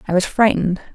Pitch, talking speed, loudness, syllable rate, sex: 195 Hz, 190 wpm, -17 LUFS, 7.6 syllables/s, female